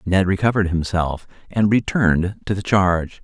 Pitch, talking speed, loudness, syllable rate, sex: 95 Hz, 150 wpm, -19 LUFS, 5.2 syllables/s, male